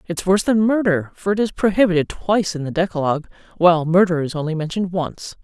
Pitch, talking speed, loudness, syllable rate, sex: 180 Hz, 200 wpm, -19 LUFS, 6.5 syllables/s, female